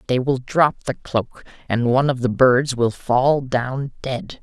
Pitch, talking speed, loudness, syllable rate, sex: 130 Hz, 190 wpm, -20 LUFS, 3.8 syllables/s, male